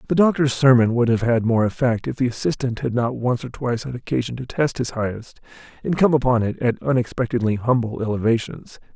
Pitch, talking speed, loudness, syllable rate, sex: 125 Hz, 200 wpm, -21 LUFS, 5.9 syllables/s, male